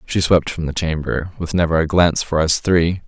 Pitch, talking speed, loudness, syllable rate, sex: 85 Hz, 215 wpm, -18 LUFS, 5.2 syllables/s, male